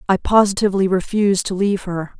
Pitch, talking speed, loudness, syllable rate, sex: 195 Hz, 165 wpm, -18 LUFS, 6.6 syllables/s, female